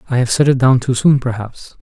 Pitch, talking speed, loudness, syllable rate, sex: 125 Hz, 265 wpm, -14 LUFS, 5.7 syllables/s, male